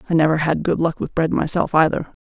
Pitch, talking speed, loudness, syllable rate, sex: 160 Hz, 240 wpm, -19 LUFS, 6.2 syllables/s, female